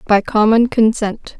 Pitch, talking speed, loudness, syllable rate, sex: 220 Hz, 130 wpm, -14 LUFS, 4.1 syllables/s, female